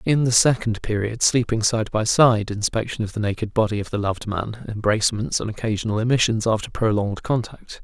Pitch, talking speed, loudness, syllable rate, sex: 110 Hz, 185 wpm, -21 LUFS, 5.7 syllables/s, male